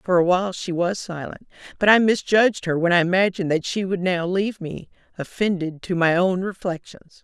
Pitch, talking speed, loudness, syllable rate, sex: 185 Hz, 200 wpm, -21 LUFS, 5.5 syllables/s, female